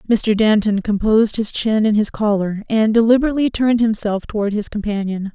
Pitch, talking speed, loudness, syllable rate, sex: 215 Hz, 170 wpm, -17 LUFS, 5.7 syllables/s, female